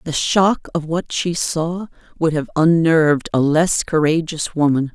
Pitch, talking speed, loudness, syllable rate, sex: 160 Hz, 160 wpm, -17 LUFS, 4.1 syllables/s, female